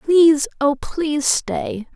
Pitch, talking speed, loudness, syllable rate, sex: 275 Hz, 125 wpm, -18 LUFS, 3.7 syllables/s, female